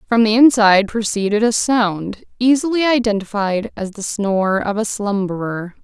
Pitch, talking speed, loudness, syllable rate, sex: 215 Hz, 145 wpm, -17 LUFS, 4.8 syllables/s, female